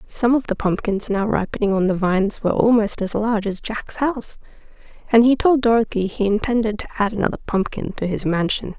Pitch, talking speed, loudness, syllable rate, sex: 215 Hz, 200 wpm, -20 LUFS, 5.9 syllables/s, female